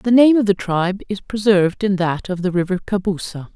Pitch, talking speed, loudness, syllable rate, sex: 195 Hz, 220 wpm, -18 LUFS, 5.7 syllables/s, female